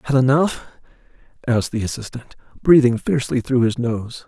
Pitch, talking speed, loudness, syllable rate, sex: 125 Hz, 140 wpm, -19 LUFS, 5.6 syllables/s, male